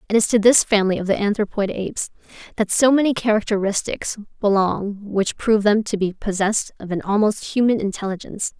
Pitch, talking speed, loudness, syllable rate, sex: 210 Hz, 175 wpm, -20 LUFS, 5.8 syllables/s, female